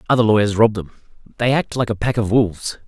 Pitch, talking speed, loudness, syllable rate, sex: 110 Hz, 230 wpm, -18 LUFS, 6.5 syllables/s, male